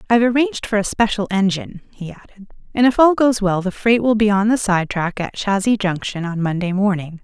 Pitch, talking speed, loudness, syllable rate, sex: 205 Hz, 215 wpm, -18 LUFS, 5.9 syllables/s, female